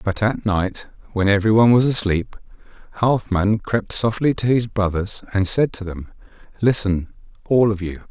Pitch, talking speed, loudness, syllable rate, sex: 105 Hz, 165 wpm, -19 LUFS, 4.9 syllables/s, male